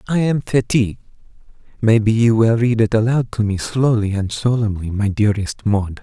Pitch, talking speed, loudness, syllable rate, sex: 110 Hz, 160 wpm, -17 LUFS, 5.1 syllables/s, male